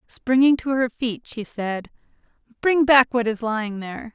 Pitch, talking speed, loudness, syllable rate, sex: 240 Hz, 175 wpm, -21 LUFS, 4.6 syllables/s, female